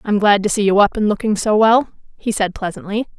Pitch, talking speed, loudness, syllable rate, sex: 210 Hz, 245 wpm, -16 LUFS, 5.8 syllables/s, female